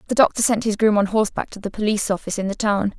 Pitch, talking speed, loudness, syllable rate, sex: 210 Hz, 280 wpm, -20 LUFS, 7.6 syllables/s, female